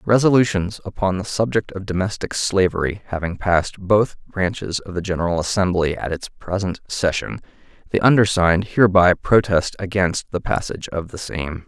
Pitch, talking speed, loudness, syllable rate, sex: 95 Hz, 150 wpm, -20 LUFS, 5.2 syllables/s, male